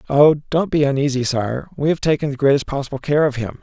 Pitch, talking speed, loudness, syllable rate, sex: 140 Hz, 230 wpm, -18 LUFS, 6.0 syllables/s, male